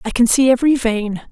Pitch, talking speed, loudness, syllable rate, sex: 240 Hz, 230 wpm, -15 LUFS, 6.1 syllables/s, female